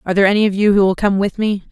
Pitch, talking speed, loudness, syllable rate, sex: 200 Hz, 350 wpm, -15 LUFS, 8.4 syllables/s, female